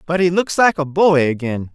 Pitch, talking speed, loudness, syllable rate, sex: 160 Hz, 240 wpm, -16 LUFS, 5.0 syllables/s, male